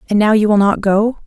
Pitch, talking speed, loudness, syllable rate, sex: 210 Hz, 285 wpm, -13 LUFS, 5.8 syllables/s, female